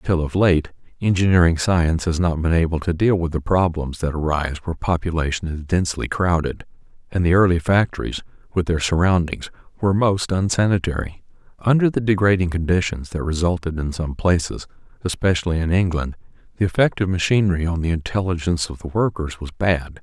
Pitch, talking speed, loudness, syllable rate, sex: 85 Hz, 165 wpm, -20 LUFS, 5.9 syllables/s, male